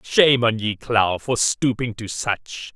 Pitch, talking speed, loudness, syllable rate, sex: 110 Hz, 175 wpm, -20 LUFS, 3.8 syllables/s, male